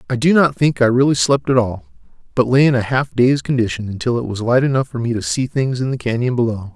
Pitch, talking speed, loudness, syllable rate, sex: 125 Hz, 265 wpm, -17 LUFS, 6.1 syllables/s, male